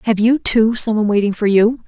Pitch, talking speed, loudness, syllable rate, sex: 220 Hz, 255 wpm, -15 LUFS, 5.8 syllables/s, female